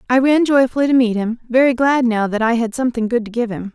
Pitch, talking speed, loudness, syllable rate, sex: 240 Hz, 275 wpm, -16 LUFS, 6.3 syllables/s, female